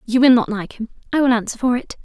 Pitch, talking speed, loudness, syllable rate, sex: 240 Hz, 295 wpm, -18 LUFS, 6.7 syllables/s, female